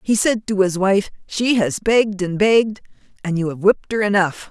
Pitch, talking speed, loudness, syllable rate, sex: 200 Hz, 215 wpm, -18 LUFS, 5.2 syllables/s, female